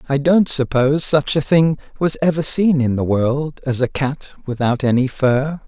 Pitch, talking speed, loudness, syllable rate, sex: 140 Hz, 190 wpm, -17 LUFS, 4.6 syllables/s, male